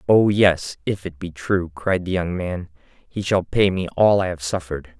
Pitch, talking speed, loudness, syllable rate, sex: 90 Hz, 215 wpm, -21 LUFS, 4.4 syllables/s, male